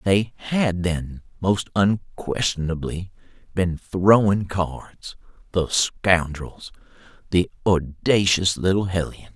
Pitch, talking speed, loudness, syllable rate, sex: 95 Hz, 90 wpm, -22 LUFS, 3.3 syllables/s, male